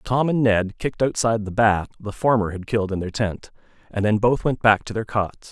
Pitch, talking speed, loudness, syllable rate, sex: 110 Hz, 240 wpm, -21 LUFS, 5.4 syllables/s, male